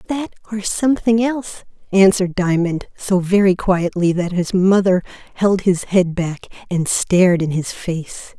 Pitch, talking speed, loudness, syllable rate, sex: 190 Hz, 150 wpm, -17 LUFS, 4.7 syllables/s, female